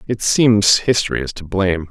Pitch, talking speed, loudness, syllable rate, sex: 100 Hz, 190 wpm, -16 LUFS, 5.2 syllables/s, male